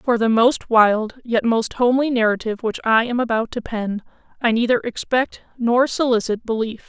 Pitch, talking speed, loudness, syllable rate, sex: 230 Hz, 175 wpm, -19 LUFS, 5.0 syllables/s, female